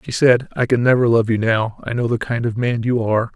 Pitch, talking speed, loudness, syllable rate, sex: 115 Hz, 285 wpm, -18 LUFS, 5.8 syllables/s, male